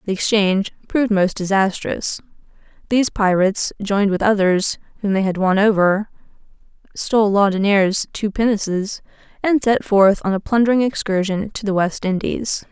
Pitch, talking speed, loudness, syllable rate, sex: 205 Hz, 140 wpm, -18 LUFS, 5.2 syllables/s, female